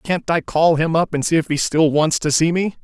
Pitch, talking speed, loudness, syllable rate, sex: 160 Hz, 295 wpm, -17 LUFS, 5.2 syllables/s, male